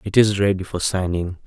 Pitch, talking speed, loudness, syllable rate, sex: 95 Hz, 205 wpm, -20 LUFS, 5.4 syllables/s, male